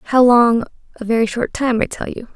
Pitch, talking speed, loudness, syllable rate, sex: 235 Hz, 205 wpm, -16 LUFS, 5.8 syllables/s, female